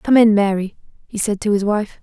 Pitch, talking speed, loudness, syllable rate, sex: 210 Hz, 235 wpm, -17 LUFS, 5.3 syllables/s, female